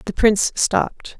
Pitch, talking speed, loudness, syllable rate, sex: 210 Hz, 150 wpm, -19 LUFS, 4.9 syllables/s, female